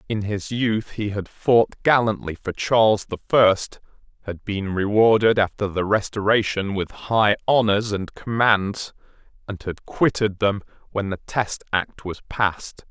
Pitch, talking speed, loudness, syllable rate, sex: 105 Hz, 150 wpm, -21 LUFS, 4.1 syllables/s, male